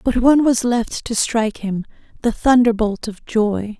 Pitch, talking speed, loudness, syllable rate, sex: 230 Hz, 160 wpm, -18 LUFS, 4.6 syllables/s, female